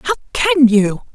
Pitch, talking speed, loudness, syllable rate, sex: 210 Hz, 155 wpm, -14 LUFS, 3.8 syllables/s, female